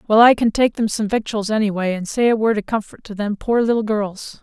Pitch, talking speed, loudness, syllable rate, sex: 215 Hz, 260 wpm, -18 LUFS, 5.6 syllables/s, female